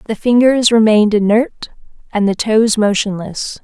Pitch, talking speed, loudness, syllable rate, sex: 215 Hz, 130 wpm, -13 LUFS, 4.5 syllables/s, female